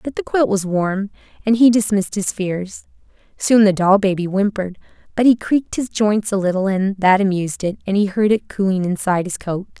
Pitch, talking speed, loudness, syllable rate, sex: 200 Hz, 210 wpm, -18 LUFS, 5.4 syllables/s, female